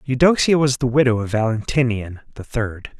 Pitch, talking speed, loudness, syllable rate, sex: 125 Hz, 160 wpm, -19 LUFS, 5.2 syllables/s, male